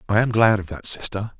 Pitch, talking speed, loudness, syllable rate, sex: 105 Hz, 260 wpm, -21 LUFS, 5.9 syllables/s, male